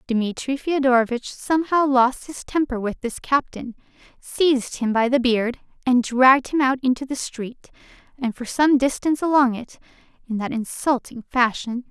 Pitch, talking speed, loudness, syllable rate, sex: 255 Hz, 155 wpm, -21 LUFS, 4.7 syllables/s, female